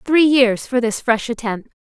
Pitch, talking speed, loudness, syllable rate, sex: 245 Hz, 195 wpm, -17 LUFS, 4.2 syllables/s, female